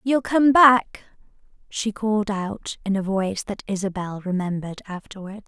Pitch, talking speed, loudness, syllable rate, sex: 205 Hz, 145 wpm, -22 LUFS, 5.0 syllables/s, female